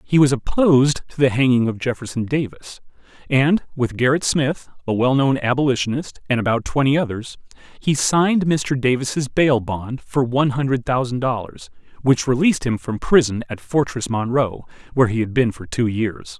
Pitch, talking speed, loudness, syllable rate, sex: 130 Hz, 170 wpm, -19 LUFS, 5.1 syllables/s, male